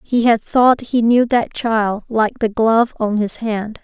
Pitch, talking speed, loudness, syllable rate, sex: 225 Hz, 205 wpm, -16 LUFS, 3.9 syllables/s, female